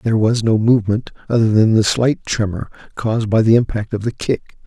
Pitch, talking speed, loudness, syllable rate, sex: 115 Hz, 205 wpm, -17 LUFS, 5.7 syllables/s, male